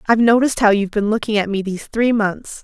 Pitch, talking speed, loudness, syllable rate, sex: 215 Hz, 250 wpm, -17 LUFS, 6.9 syllables/s, female